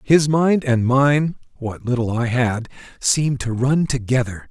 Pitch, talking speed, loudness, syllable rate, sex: 130 Hz, 135 wpm, -19 LUFS, 4.1 syllables/s, male